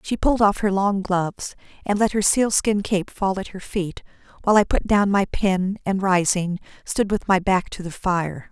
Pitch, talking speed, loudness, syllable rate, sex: 195 Hz, 210 wpm, -21 LUFS, 4.7 syllables/s, female